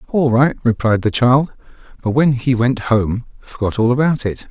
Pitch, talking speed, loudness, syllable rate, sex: 125 Hz, 185 wpm, -16 LUFS, 4.8 syllables/s, male